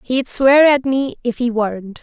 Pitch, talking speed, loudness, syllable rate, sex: 250 Hz, 210 wpm, -16 LUFS, 4.4 syllables/s, female